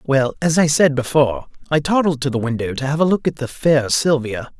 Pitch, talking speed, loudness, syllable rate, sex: 140 Hz, 235 wpm, -18 LUFS, 5.5 syllables/s, male